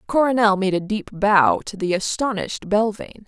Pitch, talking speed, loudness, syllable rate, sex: 205 Hz, 165 wpm, -20 LUFS, 5.4 syllables/s, female